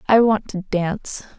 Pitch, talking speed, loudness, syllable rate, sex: 200 Hz, 175 wpm, -20 LUFS, 4.8 syllables/s, female